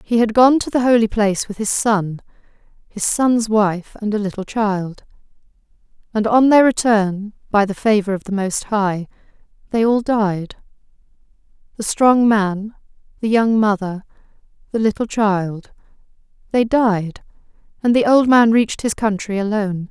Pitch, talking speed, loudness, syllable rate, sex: 215 Hz, 150 wpm, -17 LUFS, 4.5 syllables/s, female